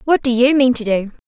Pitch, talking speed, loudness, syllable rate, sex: 245 Hz, 285 wpm, -15 LUFS, 5.7 syllables/s, female